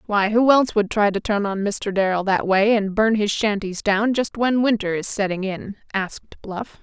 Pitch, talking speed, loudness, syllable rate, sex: 205 Hz, 220 wpm, -20 LUFS, 4.8 syllables/s, female